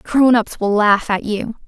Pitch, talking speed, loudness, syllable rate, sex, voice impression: 220 Hz, 215 wpm, -16 LUFS, 4.1 syllables/s, female, very feminine, slightly young, thin, very tensed, powerful, bright, soft, clear, fluent, cute, intellectual, very refreshing, sincere, calm, very friendly, very reassuring, unique, elegant, wild, sweet, lively, kind, slightly intense, light